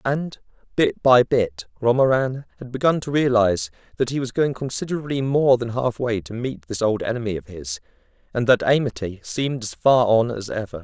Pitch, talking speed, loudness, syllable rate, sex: 120 Hz, 185 wpm, -21 LUFS, 5.3 syllables/s, male